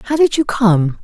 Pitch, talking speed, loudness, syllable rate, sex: 230 Hz, 230 wpm, -14 LUFS, 4.9 syllables/s, female